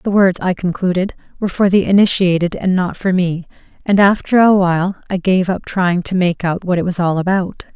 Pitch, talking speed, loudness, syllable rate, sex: 185 Hz, 215 wpm, -15 LUFS, 5.3 syllables/s, female